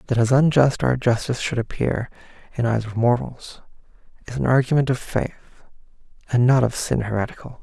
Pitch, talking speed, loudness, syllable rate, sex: 125 Hz, 165 wpm, -21 LUFS, 5.8 syllables/s, male